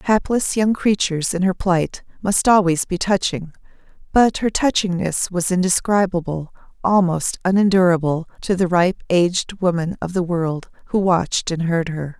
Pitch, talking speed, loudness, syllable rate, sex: 180 Hz, 145 wpm, -19 LUFS, 4.7 syllables/s, female